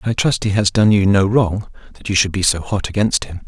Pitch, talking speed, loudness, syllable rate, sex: 100 Hz, 275 wpm, -16 LUFS, 5.6 syllables/s, male